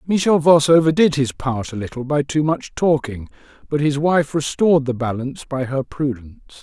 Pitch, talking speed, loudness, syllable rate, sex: 140 Hz, 180 wpm, -18 LUFS, 5.3 syllables/s, male